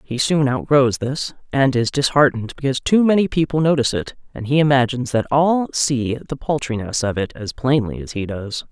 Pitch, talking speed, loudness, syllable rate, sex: 135 Hz, 195 wpm, -19 LUFS, 5.5 syllables/s, female